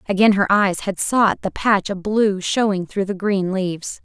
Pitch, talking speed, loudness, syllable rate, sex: 195 Hz, 210 wpm, -19 LUFS, 4.5 syllables/s, female